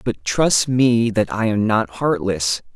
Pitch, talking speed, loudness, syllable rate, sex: 110 Hz, 175 wpm, -18 LUFS, 3.5 syllables/s, male